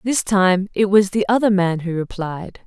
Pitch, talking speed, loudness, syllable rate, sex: 195 Hz, 205 wpm, -18 LUFS, 4.4 syllables/s, female